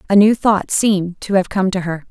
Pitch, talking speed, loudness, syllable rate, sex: 190 Hz, 255 wpm, -16 LUFS, 5.3 syllables/s, female